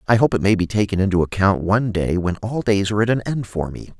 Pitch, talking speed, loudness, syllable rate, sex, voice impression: 105 Hz, 285 wpm, -19 LUFS, 6.5 syllables/s, male, very masculine, very adult-like, middle-aged, very thick, tensed, slightly powerful, bright, slightly hard, slightly muffled, fluent, slightly raspy, cool, very intellectual, sincere, very calm, very mature, slightly friendly, slightly reassuring, unique, wild, slightly sweet, slightly lively, kind